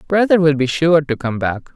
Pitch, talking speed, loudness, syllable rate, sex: 150 Hz, 240 wpm, -16 LUFS, 5.1 syllables/s, male